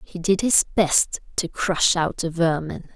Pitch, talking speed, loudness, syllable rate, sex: 175 Hz, 185 wpm, -21 LUFS, 3.8 syllables/s, female